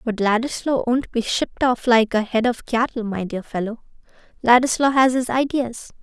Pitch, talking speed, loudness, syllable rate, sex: 240 Hz, 180 wpm, -20 LUFS, 5.0 syllables/s, female